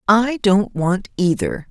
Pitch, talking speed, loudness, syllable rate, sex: 200 Hz, 140 wpm, -18 LUFS, 3.5 syllables/s, female